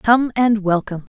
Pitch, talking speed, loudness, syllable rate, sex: 210 Hz, 160 wpm, -17 LUFS, 5.0 syllables/s, female